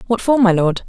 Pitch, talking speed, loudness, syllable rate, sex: 205 Hz, 275 wpm, -15 LUFS, 5.8 syllables/s, female